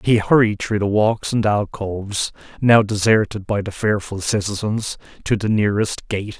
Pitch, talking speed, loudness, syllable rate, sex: 105 Hz, 170 wpm, -19 LUFS, 4.9 syllables/s, male